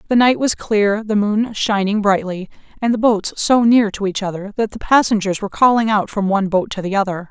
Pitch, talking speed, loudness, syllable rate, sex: 210 Hz, 230 wpm, -17 LUFS, 5.5 syllables/s, female